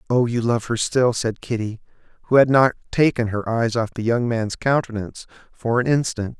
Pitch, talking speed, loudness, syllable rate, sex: 120 Hz, 195 wpm, -20 LUFS, 5.3 syllables/s, male